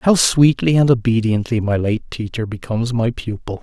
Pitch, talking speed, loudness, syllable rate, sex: 115 Hz, 165 wpm, -17 LUFS, 5.0 syllables/s, male